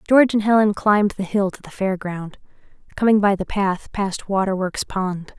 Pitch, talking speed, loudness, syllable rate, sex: 200 Hz, 190 wpm, -20 LUFS, 5.0 syllables/s, female